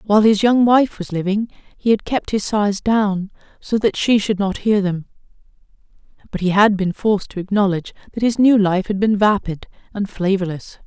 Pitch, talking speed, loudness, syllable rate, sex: 205 Hz, 195 wpm, -18 LUFS, 5.2 syllables/s, female